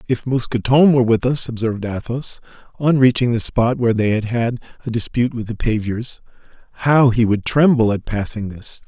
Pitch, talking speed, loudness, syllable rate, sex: 120 Hz, 180 wpm, -18 LUFS, 5.4 syllables/s, male